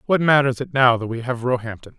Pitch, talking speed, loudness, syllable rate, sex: 130 Hz, 240 wpm, -19 LUFS, 6.0 syllables/s, male